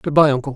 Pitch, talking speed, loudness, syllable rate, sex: 140 Hz, 325 wpm, -16 LUFS, 7.8 syllables/s, male